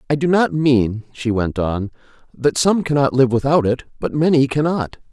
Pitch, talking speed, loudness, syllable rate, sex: 135 Hz, 190 wpm, -18 LUFS, 4.8 syllables/s, male